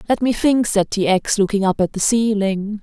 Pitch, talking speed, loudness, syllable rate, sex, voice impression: 210 Hz, 235 wpm, -18 LUFS, 4.9 syllables/s, female, feminine, adult-like, fluent, slightly intellectual, slightly sweet